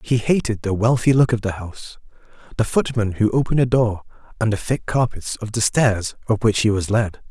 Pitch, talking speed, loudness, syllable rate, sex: 115 Hz, 215 wpm, -20 LUFS, 5.5 syllables/s, male